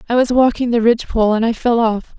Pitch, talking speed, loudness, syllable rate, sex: 230 Hz, 245 wpm, -15 LUFS, 6.5 syllables/s, female